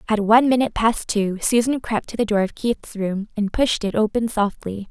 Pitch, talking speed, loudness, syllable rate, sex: 215 Hz, 220 wpm, -20 LUFS, 5.2 syllables/s, female